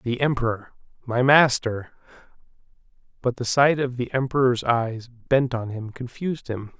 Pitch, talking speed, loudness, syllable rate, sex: 125 Hz, 140 wpm, -23 LUFS, 4.6 syllables/s, male